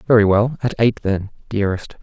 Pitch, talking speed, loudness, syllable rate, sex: 105 Hz, 180 wpm, -18 LUFS, 5.8 syllables/s, male